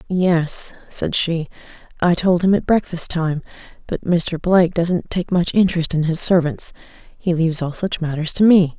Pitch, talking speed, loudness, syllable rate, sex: 170 Hz, 180 wpm, -18 LUFS, 4.6 syllables/s, female